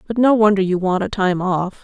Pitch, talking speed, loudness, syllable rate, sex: 195 Hz, 260 wpm, -17 LUFS, 5.4 syllables/s, female